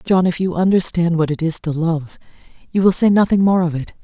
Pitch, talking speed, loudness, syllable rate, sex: 175 Hz, 240 wpm, -17 LUFS, 5.7 syllables/s, female